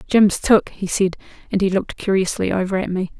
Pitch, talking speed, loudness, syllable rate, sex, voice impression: 190 Hz, 205 wpm, -19 LUFS, 5.6 syllables/s, female, feminine, adult-like, slightly intellectual, slightly sweet